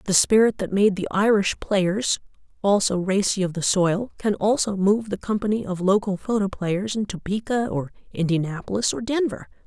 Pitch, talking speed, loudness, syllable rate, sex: 200 Hz, 170 wpm, -22 LUFS, 5.0 syllables/s, female